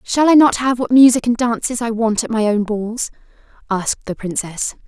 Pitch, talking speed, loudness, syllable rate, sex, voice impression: 230 Hz, 210 wpm, -16 LUFS, 5.1 syllables/s, female, feminine, slightly adult-like, fluent, slightly cute, friendly